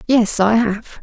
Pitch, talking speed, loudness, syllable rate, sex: 220 Hz, 175 wpm, -16 LUFS, 3.5 syllables/s, female